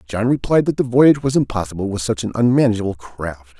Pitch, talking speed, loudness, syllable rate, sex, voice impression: 110 Hz, 200 wpm, -18 LUFS, 6.2 syllables/s, male, very masculine, very adult-like, old, very thick, tensed, very powerful, bright, soft, muffled, very fluent, slightly raspy, very cool, very intellectual, very sincere, very calm, very mature, friendly, very reassuring, unique, elegant, very wild, sweet, very lively, kind, slightly light